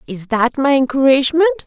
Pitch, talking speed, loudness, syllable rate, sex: 280 Hz, 145 wpm, -15 LUFS, 5.3 syllables/s, female